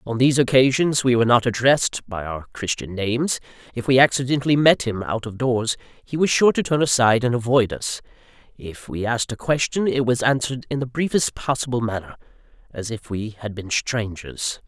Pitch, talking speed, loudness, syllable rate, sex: 120 Hz, 190 wpm, -21 LUFS, 5.5 syllables/s, male